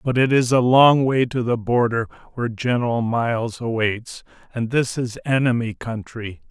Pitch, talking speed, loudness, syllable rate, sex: 120 Hz, 165 wpm, -20 LUFS, 4.7 syllables/s, male